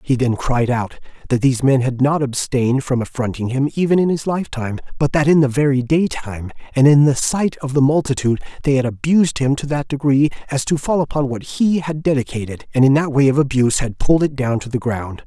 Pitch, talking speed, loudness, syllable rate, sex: 135 Hz, 230 wpm, -17 LUFS, 5.9 syllables/s, male